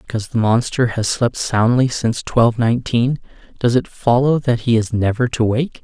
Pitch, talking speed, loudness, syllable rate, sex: 120 Hz, 185 wpm, -17 LUFS, 5.3 syllables/s, male